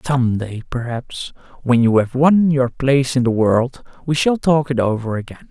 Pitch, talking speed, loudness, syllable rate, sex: 130 Hz, 195 wpm, -17 LUFS, 4.6 syllables/s, male